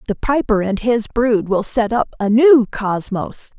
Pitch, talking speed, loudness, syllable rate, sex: 225 Hz, 185 wpm, -16 LUFS, 4.1 syllables/s, female